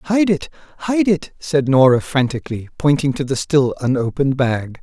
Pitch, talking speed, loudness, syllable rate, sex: 145 Hz, 160 wpm, -17 LUFS, 5.0 syllables/s, male